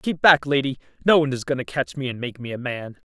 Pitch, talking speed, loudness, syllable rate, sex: 135 Hz, 290 wpm, -22 LUFS, 6.3 syllables/s, male